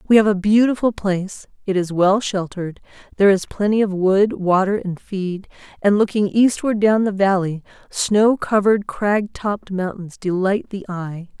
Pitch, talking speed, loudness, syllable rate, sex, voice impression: 200 Hz, 165 wpm, -19 LUFS, 4.8 syllables/s, female, feminine, adult-like, tensed, bright, clear, fluent, intellectual, calm, friendly, reassuring, elegant, lively, kind